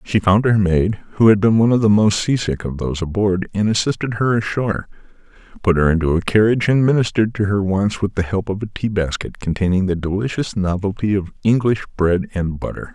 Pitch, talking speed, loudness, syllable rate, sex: 100 Hz, 205 wpm, -18 LUFS, 5.8 syllables/s, male